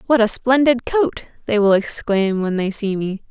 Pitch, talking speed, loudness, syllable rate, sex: 225 Hz, 200 wpm, -18 LUFS, 4.5 syllables/s, female